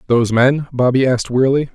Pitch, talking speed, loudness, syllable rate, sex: 130 Hz, 170 wpm, -15 LUFS, 6.6 syllables/s, male